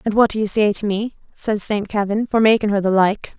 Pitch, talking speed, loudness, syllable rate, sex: 210 Hz, 265 wpm, -18 LUFS, 5.5 syllables/s, female